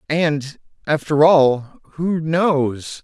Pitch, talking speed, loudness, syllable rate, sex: 150 Hz, 100 wpm, -18 LUFS, 2.3 syllables/s, male